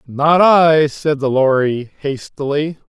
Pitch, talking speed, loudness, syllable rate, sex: 145 Hz, 125 wpm, -15 LUFS, 3.4 syllables/s, male